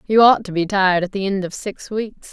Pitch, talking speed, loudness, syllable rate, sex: 195 Hz, 285 wpm, -18 LUFS, 5.6 syllables/s, female